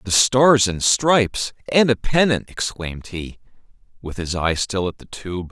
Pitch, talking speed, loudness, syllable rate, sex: 110 Hz, 175 wpm, -19 LUFS, 4.3 syllables/s, male